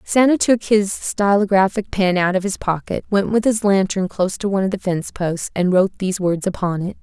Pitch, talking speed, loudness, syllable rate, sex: 195 Hz, 220 wpm, -18 LUFS, 5.6 syllables/s, female